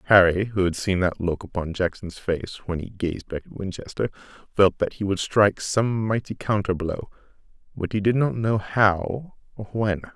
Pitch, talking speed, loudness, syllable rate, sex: 100 Hz, 190 wpm, -24 LUFS, 4.9 syllables/s, male